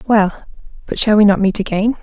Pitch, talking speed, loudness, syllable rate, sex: 205 Hz, 205 wpm, -14 LUFS, 5.6 syllables/s, female